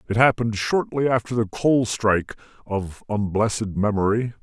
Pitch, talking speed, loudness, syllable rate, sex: 110 Hz, 135 wpm, -22 LUFS, 5.1 syllables/s, male